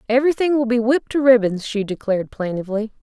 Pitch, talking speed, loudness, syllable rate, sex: 235 Hz, 175 wpm, -19 LUFS, 6.9 syllables/s, female